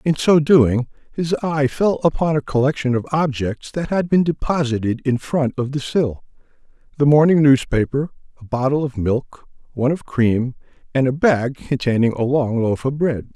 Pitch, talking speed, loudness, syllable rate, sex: 135 Hz, 170 wpm, -19 LUFS, 4.8 syllables/s, male